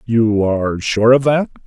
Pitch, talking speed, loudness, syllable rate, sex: 115 Hz, 180 wpm, -15 LUFS, 4.3 syllables/s, male